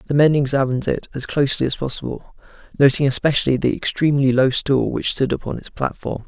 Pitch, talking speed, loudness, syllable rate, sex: 135 Hz, 180 wpm, -19 LUFS, 6.2 syllables/s, male